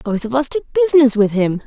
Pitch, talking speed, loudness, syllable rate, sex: 255 Hz, 255 wpm, -15 LUFS, 7.2 syllables/s, female